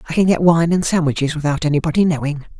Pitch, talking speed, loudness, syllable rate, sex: 160 Hz, 210 wpm, -17 LUFS, 7.0 syllables/s, male